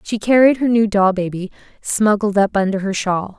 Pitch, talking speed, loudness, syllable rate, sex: 205 Hz, 195 wpm, -16 LUFS, 5.0 syllables/s, female